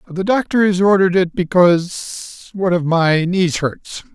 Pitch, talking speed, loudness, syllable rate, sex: 180 Hz, 160 wpm, -16 LUFS, 4.4 syllables/s, male